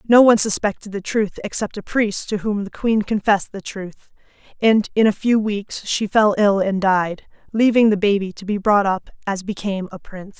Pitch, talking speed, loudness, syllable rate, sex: 205 Hz, 210 wpm, -19 LUFS, 5.1 syllables/s, female